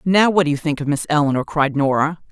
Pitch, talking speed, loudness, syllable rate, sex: 155 Hz, 260 wpm, -18 LUFS, 6.2 syllables/s, female